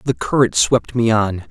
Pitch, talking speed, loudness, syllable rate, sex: 115 Hz, 200 wpm, -16 LUFS, 4.4 syllables/s, male